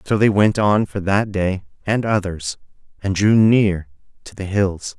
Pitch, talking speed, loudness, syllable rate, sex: 100 Hz, 180 wpm, -18 LUFS, 4.1 syllables/s, male